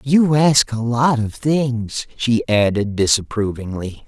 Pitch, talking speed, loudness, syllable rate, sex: 120 Hz, 135 wpm, -18 LUFS, 3.6 syllables/s, male